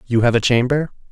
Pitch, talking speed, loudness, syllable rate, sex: 125 Hz, 215 wpm, -17 LUFS, 6.0 syllables/s, male